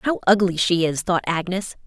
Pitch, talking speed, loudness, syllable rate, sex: 185 Hz, 195 wpm, -20 LUFS, 4.9 syllables/s, female